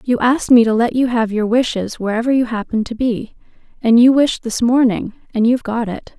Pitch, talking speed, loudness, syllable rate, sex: 235 Hz, 225 wpm, -16 LUFS, 5.7 syllables/s, female